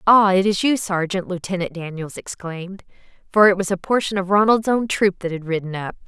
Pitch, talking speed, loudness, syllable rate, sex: 190 Hz, 210 wpm, -20 LUFS, 5.6 syllables/s, female